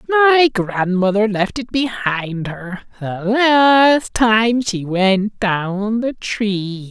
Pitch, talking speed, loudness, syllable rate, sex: 215 Hz, 120 wpm, -16 LUFS, 2.6 syllables/s, male